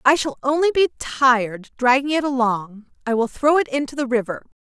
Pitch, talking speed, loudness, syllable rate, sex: 260 Hz, 195 wpm, -20 LUFS, 5.3 syllables/s, female